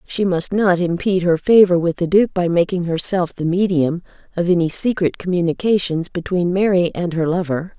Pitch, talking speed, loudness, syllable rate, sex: 175 Hz, 175 wpm, -18 LUFS, 5.2 syllables/s, female